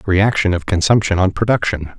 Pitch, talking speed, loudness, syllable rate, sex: 95 Hz, 150 wpm, -16 LUFS, 5.6 syllables/s, male